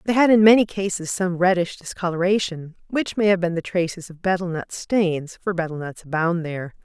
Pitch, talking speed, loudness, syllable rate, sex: 180 Hz, 200 wpm, -21 LUFS, 5.4 syllables/s, female